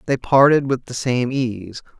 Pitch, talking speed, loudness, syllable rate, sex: 125 Hz, 180 wpm, -18 LUFS, 4.1 syllables/s, male